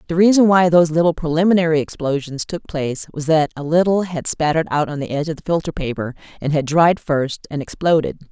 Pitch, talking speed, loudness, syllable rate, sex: 160 Hz, 210 wpm, -18 LUFS, 6.2 syllables/s, female